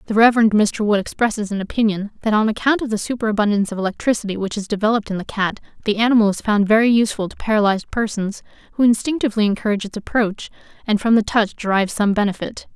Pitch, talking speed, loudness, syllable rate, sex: 215 Hz, 200 wpm, -19 LUFS, 7.1 syllables/s, female